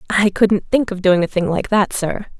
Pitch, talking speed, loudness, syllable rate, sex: 195 Hz, 250 wpm, -17 LUFS, 4.7 syllables/s, female